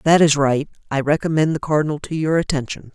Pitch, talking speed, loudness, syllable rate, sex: 150 Hz, 205 wpm, -19 LUFS, 6.1 syllables/s, female